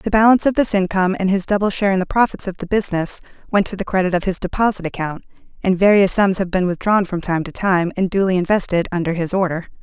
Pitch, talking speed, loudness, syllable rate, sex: 190 Hz, 240 wpm, -18 LUFS, 6.6 syllables/s, female